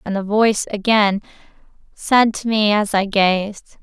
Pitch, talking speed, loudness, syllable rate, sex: 210 Hz, 155 wpm, -17 LUFS, 4.1 syllables/s, female